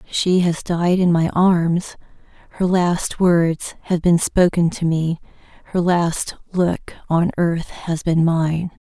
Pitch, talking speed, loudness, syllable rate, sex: 170 Hz, 150 wpm, -19 LUFS, 3.4 syllables/s, female